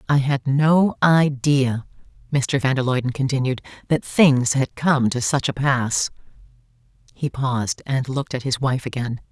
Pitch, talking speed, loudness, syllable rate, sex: 135 Hz, 160 wpm, -20 LUFS, 4.4 syllables/s, female